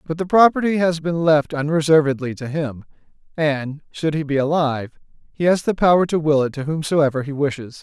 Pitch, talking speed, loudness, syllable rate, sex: 155 Hz, 190 wpm, -19 LUFS, 5.4 syllables/s, male